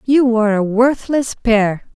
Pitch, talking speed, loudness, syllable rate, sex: 230 Hz, 150 wpm, -15 LUFS, 4.1 syllables/s, female